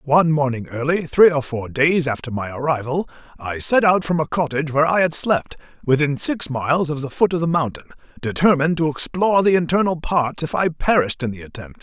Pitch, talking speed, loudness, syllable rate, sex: 150 Hz, 210 wpm, -19 LUFS, 5.8 syllables/s, male